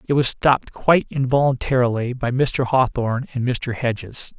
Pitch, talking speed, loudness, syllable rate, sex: 125 Hz, 150 wpm, -20 LUFS, 4.9 syllables/s, male